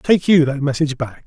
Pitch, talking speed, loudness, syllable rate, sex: 145 Hz, 240 wpm, -17 LUFS, 5.7 syllables/s, male